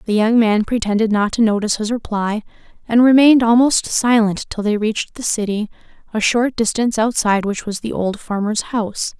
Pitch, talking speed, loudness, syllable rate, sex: 220 Hz, 185 wpm, -17 LUFS, 5.5 syllables/s, female